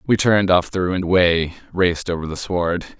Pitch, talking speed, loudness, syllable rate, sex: 90 Hz, 200 wpm, -19 LUFS, 5.5 syllables/s, male